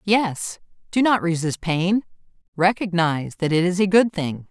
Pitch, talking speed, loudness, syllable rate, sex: 180 Hz, 160 wpm, -21 LUFS, 4.5 syllables/s, female